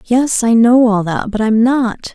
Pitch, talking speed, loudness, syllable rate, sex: 230 Hz, 250 wpm, -13 LUFS, 4.8 syllables/s, female